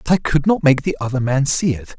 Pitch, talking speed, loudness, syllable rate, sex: 140 Hz, 300 wpm, -17 LUFS, 6.0 syllables/s, male